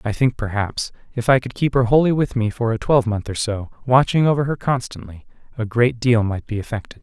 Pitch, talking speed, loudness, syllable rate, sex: 120 Hz, 220 wpm, -20 LUFS, 5.7 syllables/s, male